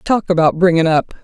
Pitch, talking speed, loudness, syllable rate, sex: 170 Hz, 195 wpm, -14 LUFS, 5.3 syllables/s, female